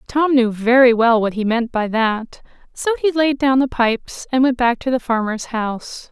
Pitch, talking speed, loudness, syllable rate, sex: 245 Hz, 215 wpm, -17 LUFS, 4.7 syllables/s, female